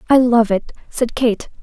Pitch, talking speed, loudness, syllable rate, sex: 235 Hz, 185 wpm, -16 LUFS, 4.6 syllables/s, female